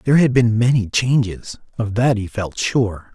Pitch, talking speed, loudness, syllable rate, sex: 115 Hz, 190 wpm, -18 LUFS, 4.6 syllables/s, male